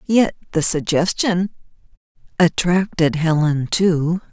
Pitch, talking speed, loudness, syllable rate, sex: 170 Hz, 85 wpm, -18 LUFS, 3.5 syllables/s, female